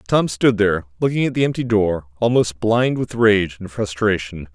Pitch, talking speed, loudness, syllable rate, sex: 105 Hz, 185 wpm, -19 LUFS, 4.9 syllables/s, male